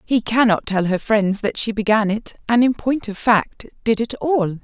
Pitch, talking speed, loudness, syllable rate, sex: 220 Hz, 220 wpm, -19 LUFS, 4.4 syllables/s, female